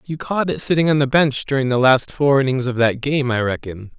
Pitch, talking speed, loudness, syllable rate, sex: 135 Hz, 255 wpm, -18 LUFS, 5.5 syllables/s, male